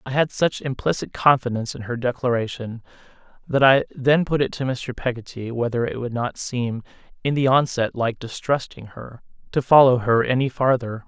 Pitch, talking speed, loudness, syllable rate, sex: 125 Hz, 175 wpm, -21 LUFS, 5.1 syllables/s, male